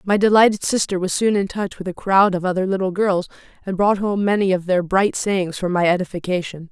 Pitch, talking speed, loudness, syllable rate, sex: 190 Hz, 225 wpm, -19 LUFS, 5.6 syllables/s, female